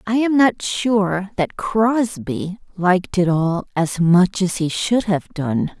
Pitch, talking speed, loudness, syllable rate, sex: 190 Hz, 165 wpm, -19 LUFS, 3.4 syllables/s, female